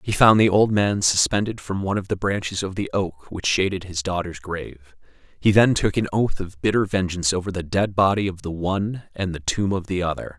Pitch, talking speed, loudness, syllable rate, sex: 95 Hz, 230 wpm, -22 LUFS, 5.5 syllables/s, male